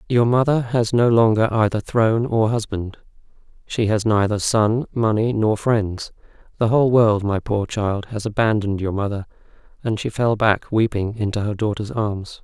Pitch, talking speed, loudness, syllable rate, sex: 110 Hz, 170 wpm, -20 LUFS, 4.8 syllables/s, male